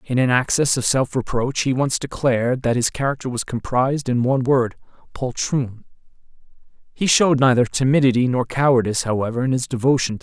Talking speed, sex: 170 wpm, male